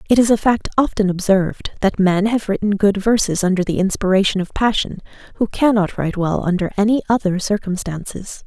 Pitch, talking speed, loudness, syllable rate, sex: 200 Hz, 175 wpm, -18 LUFS, 5.7 syllables/s, female